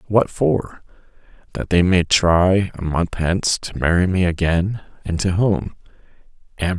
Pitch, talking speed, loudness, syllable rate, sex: 90 Hz, 135 wpm, -19 LUFS, 4.1 syllables/s, male